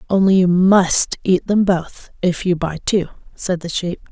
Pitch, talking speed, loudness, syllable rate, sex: 180 Hz, 190 wpm, -17 LUFS, 4.2 syllables/s, female